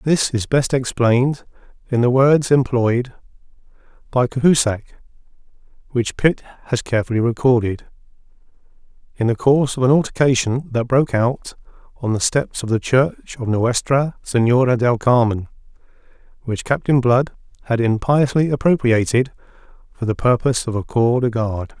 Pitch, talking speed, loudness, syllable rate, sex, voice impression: 125 Hz, 130 wpm, -18 LUFS, 4.9 syllables/s, male, very masculine, very adult-like, very middle-aged, very thick, slightly relaxed, powerful, dark, soft, slightly muffled, fluent, slightly raspy, very cool, intellectual, very sincere, very calm, very mature, very friendly, very reassuring, unique, elegant, very wild, sweet, slightly lively, very kind, modest